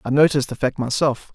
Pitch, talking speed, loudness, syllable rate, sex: 135 Hz, 225 wpm, -20 LUFS, 6.4 syllables/s, male